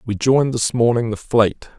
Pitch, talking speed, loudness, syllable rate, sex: 115 Hz, 200 wpm, -18 LUFS, 5.0 syllables/s, male